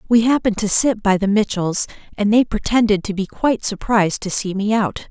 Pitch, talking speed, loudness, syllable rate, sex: 210 Hz, 210 wpm, -18 LUFS, 5.6 syllables/s, female